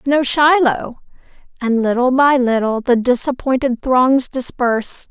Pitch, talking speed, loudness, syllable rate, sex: 255 Hz, 120 wpm, -15 LUFS, 4.1 syllables/s, female